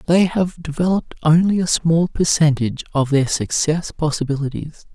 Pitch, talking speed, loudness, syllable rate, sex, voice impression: 160 Hz, 135 wpm, -18 LUFS, 5.1 syllables/s, male, masculine, very adult-like, slightly soft, slightly muffled, slightly refreshing, slightly unique, kind